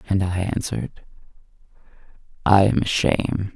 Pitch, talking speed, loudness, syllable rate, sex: 95 Hz, 100 wpm, -21 LUFS, 5.1 syllables/s, male